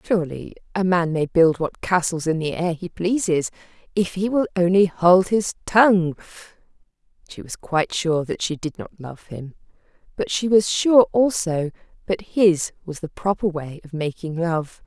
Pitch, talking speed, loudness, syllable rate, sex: 175 Hz, 175 wpm, -21 LUFS, 4.6 syllables/s, female